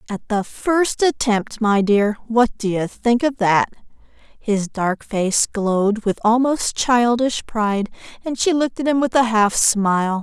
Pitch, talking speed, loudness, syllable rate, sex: 225 Hz, 170 wpm, -18 LUFS, 4.0 syllables/s, female